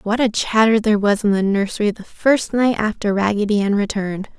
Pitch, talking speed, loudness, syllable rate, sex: 210 Hz, 205 wpm, -18 LUFS, 5.7 syllables/s, female